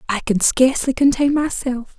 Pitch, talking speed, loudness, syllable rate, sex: 260 Hz, 150 wpm, -17 LUFS, 5.0 syllables/s, female